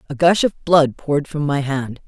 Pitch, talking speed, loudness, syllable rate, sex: 150 Hz, 230 wpm, -18 LUFS, 4.9 syllables/s, female